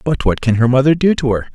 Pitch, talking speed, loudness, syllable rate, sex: 130 Hz, 310 wpm, -14 LUFS, 6.5 syllables/s, male